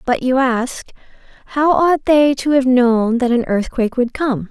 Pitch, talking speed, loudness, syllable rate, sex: 255 Hz, 185 wpm, -16 LUFS, 4.3 syllables/s, female